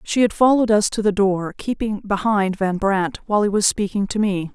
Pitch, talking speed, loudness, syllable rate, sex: 205 Hz, 225 wpm, -19 LUFS, 5.4 syllables/s, female